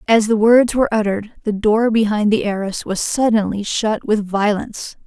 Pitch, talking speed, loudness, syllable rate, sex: 215 Hz, 180 wpm, -17 LUFS, 5.1 syllables/s, female